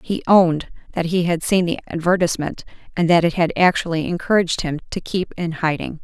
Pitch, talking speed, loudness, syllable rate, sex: 170 Hz, 190 wpm, -19 LUFS, 5.9 syllables/s, female